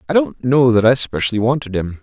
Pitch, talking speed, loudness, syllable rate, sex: 115 Hz, 235 wpm, -16 LUFS, 6.0 syllables/s, male